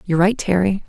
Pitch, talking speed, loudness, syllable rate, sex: 190 Hz, 205 wpm, -18 LUFS, 6.5 syllables/s, female